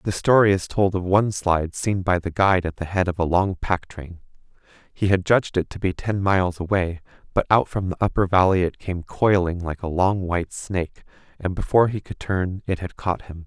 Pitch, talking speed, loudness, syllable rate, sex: 90 Hz, 225 wpm, -22 LUFS, 5.4 syllables/s, male